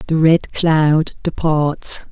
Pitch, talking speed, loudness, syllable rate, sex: 155 Hz, 115 wpm, -16 LUFS, 2.7 syllables/s, female